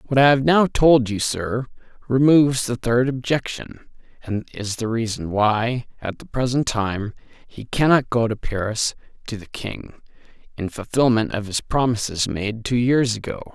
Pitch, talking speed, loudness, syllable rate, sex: 120 Hz, 165 wpm, -21 LUFS, 4.4 syllables/s, male